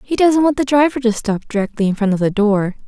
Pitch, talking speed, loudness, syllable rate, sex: 235 Hz, 270 wpm, -16 LUFS, 6.0 syllables/s, female